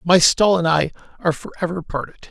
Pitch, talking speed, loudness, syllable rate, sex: 170 Hz, 210 wpm, -19 LUFS, 6.4 syllables/s, male